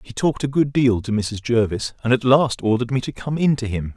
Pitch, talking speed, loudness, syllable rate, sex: 120 Hz, 275 wpm, -20 LUFS, 5.9 syllables/s, male